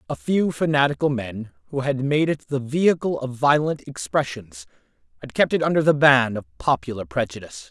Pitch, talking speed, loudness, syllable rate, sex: 140 Hz, 170 wpm, -22 LUFS, 5.3 syllables/s, male